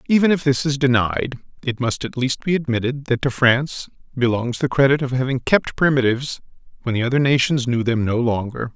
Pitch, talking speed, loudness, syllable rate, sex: 130 Hz, 200 wpm, -19 LUFS, 5.7 syllables/s, male